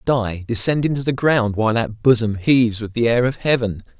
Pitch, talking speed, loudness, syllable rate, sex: 115 Hz, 210 wpm, -18 LUFS, 5.4 syllables/s, male